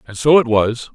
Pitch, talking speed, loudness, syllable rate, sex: 125 Hz, 255 wpm, -15 LUFS, 5.1 syllables/s, male